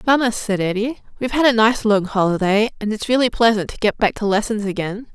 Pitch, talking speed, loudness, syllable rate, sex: 215 Hz, 220 wpm, -18 LUFS, 5.9 syllables/s, female